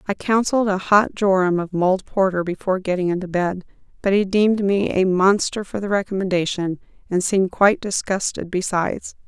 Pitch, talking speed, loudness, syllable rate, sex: 190 Hz, 170 wpm, -20 LUFS, 5.6 syllables/s, female